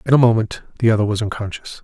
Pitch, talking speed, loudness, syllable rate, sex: 110 Hz, 230 wpm, -18 LUFS, 7.0 syllables/s, male